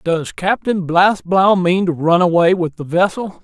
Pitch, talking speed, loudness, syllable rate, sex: 175 Hz, 175 wpm, -15 LUFS, 4.2 syllables/s, male